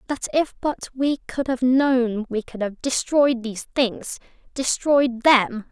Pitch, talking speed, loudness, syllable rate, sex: 250 Hz, 125 wpm, -21 LUFS, 3.9 syllables/s, female